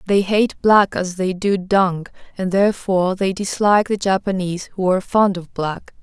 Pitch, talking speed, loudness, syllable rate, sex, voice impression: 190 Hz, 180 wpm, -18 LUFS, 5.0 syllables/s, female, very feminine, young, very thin, very tensed, powerful, very bright, hard, very clear, fluent, slightly raspy, cute, intellectual, very refreshing, very sincere, slightly calm, friendly, reassuring, unique, slightly elegant, wild, sweet, lively, slightly strict, intense